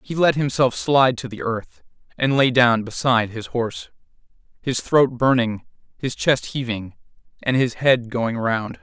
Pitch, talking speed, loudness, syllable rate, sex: 125 Hz, 165 wpm, -20 LUFS, 4.5 syllables/s, male